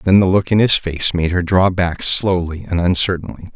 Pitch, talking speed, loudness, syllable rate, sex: 90 Hz, 220 wpm, -16 LUFS, 5.0 syllables/s, male